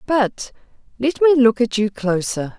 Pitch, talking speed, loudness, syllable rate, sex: 230 Hz, 165 wpm, -18 LUFS, 4.4 syllables/s, female